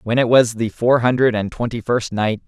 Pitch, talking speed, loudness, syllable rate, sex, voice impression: 115 Hz, 240 wpm, -18 LUFS, 5.2 syllables/s, male, masculine, slightly young, adult-like, slightly thick, slightly relaxed, slightly powerful, bright, slightly soft, clear, fluent, cool, slightly intellectual, very refreshing, sincere, calm, very friendly, reassuring, slightly unique, elegant, slightly wild, sweet, lively, very kind, slightly modest, slightly light